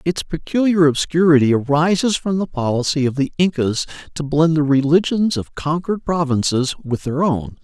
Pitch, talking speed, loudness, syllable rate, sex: 155 Hz, 155 wpm, -18 LUFS, 5.0 syllables/s, male